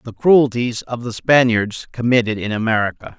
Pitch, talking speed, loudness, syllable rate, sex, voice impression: 120 Hz, 150 wpm, -17 LUFS, 5.0 syllables/s, male, masculine, adult-like, clear, refreshing, slightly friendly, slightly unique